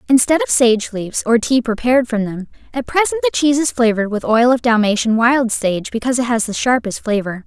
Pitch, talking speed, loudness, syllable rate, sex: 240 Hz, 215 wpm, -16 LUFS, 5.9 syllables/s, female